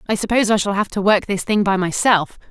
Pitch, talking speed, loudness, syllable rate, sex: 200 Hz, 265 wpm, -18 LUFS, 6.3 syllables/s, female